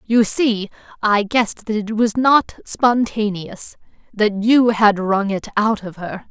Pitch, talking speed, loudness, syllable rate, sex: 215 Hz, 160 wpm, -17 LUFS, 3.7 syllables/s, female